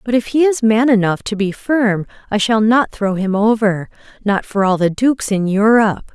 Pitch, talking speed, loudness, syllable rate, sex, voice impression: 215 Hz, 205 wpm, -15 LUFS, 5.0 syllables/s, female, feminine, adult-like, tensed, powerful, clear, fluent, intellectual, calm, slightly unique, lively, slightly strict, slightly sharp